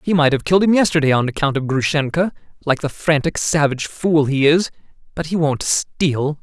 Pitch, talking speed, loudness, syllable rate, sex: 150 Hz, 195 wpm, -17 LUFS, 5.4 syllables/s, male